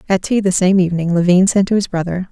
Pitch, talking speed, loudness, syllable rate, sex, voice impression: 185 Hz, 260 wpm, -15 LUFS, 6.6 syllables/s, female, very feminine, middle-aged, thin, slightly tensed, weak, bright, very soft, very clear, fluent, very cute, slightly cool, very intellectual, very refreshing, sincere, very calm, very friendly, very reassuring, unique, very elegant, slightly wild, very sweet, lively, very kind, modest, light